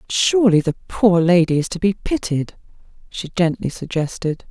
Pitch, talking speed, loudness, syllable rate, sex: 180 Hz, 145 wpm, -18 LUFS, 4.9 syllables/s, female